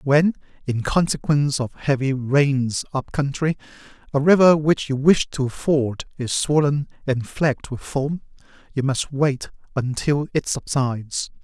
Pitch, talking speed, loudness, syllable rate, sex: 140 Hz, 140 wpm, -21 LUFS, 4.1 syllables/s, male